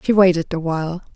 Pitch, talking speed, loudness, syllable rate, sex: 175 Hz, 205 wpm, -19 LUFS, 6.3 syllables/s, female